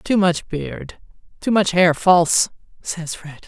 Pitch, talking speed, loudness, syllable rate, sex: 175 Hz, 120 wpm, -18 LUFS, 3.8 syllables/s, female